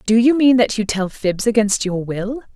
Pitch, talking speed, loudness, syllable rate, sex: 220 Hz, 235 wpm, -17 LUFS, 4.7 syllables/s, female